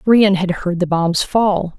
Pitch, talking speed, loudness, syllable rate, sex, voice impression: 185 Hz, 200 wpm, -16 LUFS, 3.6 syllables/s, female, feminine, adult-like, intellectual, slightly sharp